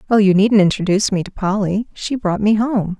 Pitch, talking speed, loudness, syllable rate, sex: 205 Hz, 200 wpm, -16 LUFS, 5.5 syllables/s, female